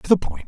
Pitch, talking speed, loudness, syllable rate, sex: 135 Hz, 375 wpm, -21 LUFS, 7.0 syllables/s, male